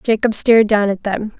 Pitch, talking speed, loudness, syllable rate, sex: 210 Hz, 215 wpm, -15 LUFS, 5.3 syllables/s, female